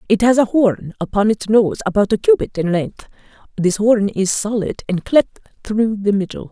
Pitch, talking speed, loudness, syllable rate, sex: 210 Hz, 195 wpm, -17 LUFS, 5.0 syllables/s, female